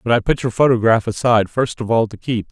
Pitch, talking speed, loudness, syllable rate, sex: 115 Hz, 260 wpm, -17 LUFS, 6.2 syllables/s, male